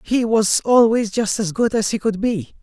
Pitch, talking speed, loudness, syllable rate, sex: 215 Hz, 230 wpm, -18 LUFS, 4.5 syllables/s, male